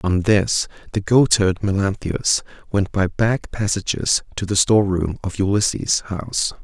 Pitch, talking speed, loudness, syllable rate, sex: 100 Hz, 145 wpm, -19 LUFS, 4.3 syllables/s, male